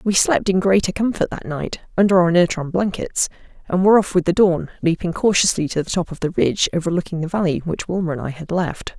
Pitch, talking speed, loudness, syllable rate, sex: 180 Hz, 225 wpm, -19 LUFS, 6.2 syllables/s, female